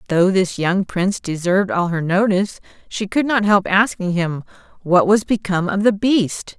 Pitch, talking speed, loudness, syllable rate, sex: 190 Hz, 180 wpm, -18 LUFS, 4.9 syllables/s, female